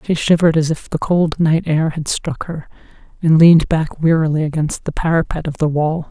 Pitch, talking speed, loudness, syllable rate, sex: 160 Hz, 205 wpm, -16 LUFS, 5.4 syllables/s, female